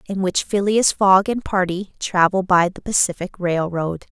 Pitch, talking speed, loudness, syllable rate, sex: 185 Hz, 160 wpm, -19 LUFS, 4.4 syllables/s, female